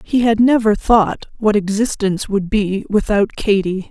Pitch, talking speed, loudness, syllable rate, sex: 205 Hz, 155 wpm, -16 LUFS, 4.6 syllables/s, female